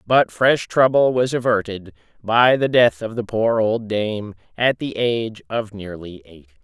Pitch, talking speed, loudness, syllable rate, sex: 110 Hz, 170 wpm, -19 LUFS, 4.4 syllables/s, male